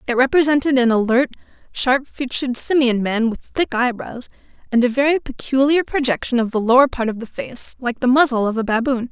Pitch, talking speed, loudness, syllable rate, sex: 250 Hz, 190 wpm, -18 LUFS, 5.6 syllables/s, female